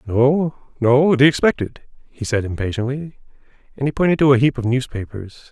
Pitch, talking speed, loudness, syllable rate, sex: 130 Hz, 165 wpm, -18 LUFS, 5.2 syllables/s, male